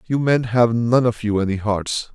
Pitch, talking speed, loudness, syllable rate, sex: 115 Hz, 225 wpm, -19 LUFS, 4.6 syllables/s, male